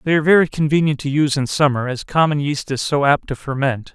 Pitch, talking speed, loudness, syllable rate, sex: 145 Hz, 245 wpm, -18 LUFS, 6.3 syllables/s, male